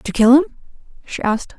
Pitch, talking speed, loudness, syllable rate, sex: 240 Hz, 225 wpm, -16 LUFS, 7.5 syllables/s, female